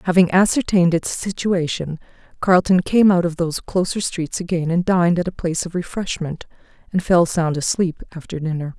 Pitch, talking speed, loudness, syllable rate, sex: 175 Hz, 170 wpm, -19 LUFS, 5.5 syllables/s, female